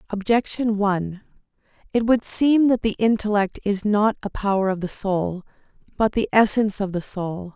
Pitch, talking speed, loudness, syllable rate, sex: 205 Hz, 165 wpm, -21 LUFS, 4.9 syllables/s, female